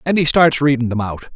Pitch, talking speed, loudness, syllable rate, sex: 140 Hz, 265 wpm, -16 LUFS, 6.0 syllables/s, male